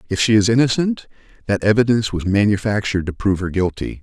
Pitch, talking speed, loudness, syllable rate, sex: 105 Hz, 180 wpm, -18 LUFS, 6.7 syllables/s, male